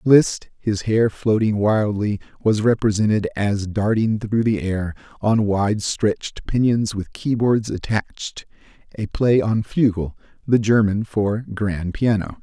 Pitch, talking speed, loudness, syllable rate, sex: 105 Hz, 130 wpm, -20 LUFS, 3.9 syllables/s, male